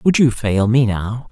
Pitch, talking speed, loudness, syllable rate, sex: 120 Hz, 230 wpm, -16 LUFS, 4.0 syllables/s, male